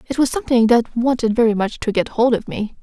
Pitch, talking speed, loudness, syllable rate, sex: 235 Hz, 255 wpm, -18 LUFS, 6.0 syllables/s, female